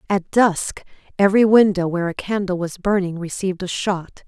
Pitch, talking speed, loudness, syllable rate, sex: 190 Hz, 170 wpm, -19 LUFS, 5.4 syllables/s, female